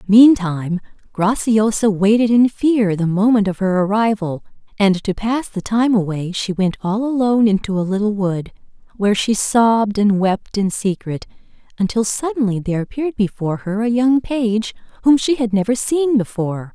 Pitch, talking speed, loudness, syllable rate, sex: 215 Hz, 165 wpm, -17 LUFS, 5.0 syllables/s, female